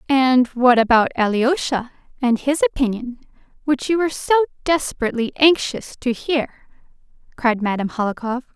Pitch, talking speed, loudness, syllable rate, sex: 260 Hz, 125 wpm, -19 LUFS, 5.2 syllables/s, female